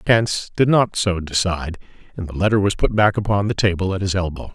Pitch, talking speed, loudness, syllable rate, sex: 95 Hz, 235 wpm, -19 LUFS, 6.1 syllables/s, male